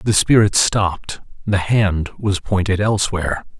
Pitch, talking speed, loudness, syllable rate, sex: 95 Hz, 135 wpm, -17 LUFS, 4.6 syllables/s, male